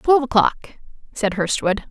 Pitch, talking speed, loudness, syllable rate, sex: 230 Hz, 125 wpm, -19 LUFS, 5.9 syllables/s, female